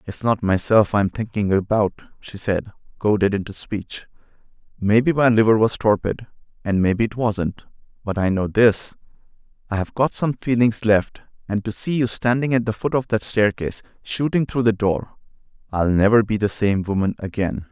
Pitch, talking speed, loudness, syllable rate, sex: 105 Hz, 170 wpm, -20 LUFS, 5.0 syllables/s, male